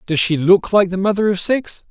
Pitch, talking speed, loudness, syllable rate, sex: 190 Hz, 250 wpm, -16 LUFS, 5.1 syllables/s, male